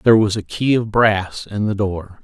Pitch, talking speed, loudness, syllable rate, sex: 105 Hz, 240 wpm, -18 LUFS, 4.6 syllables/s, male